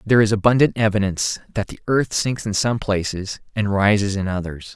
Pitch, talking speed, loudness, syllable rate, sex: 105 Hz, 190 wpm, -20 LUFS, 5.6 syllables/s, male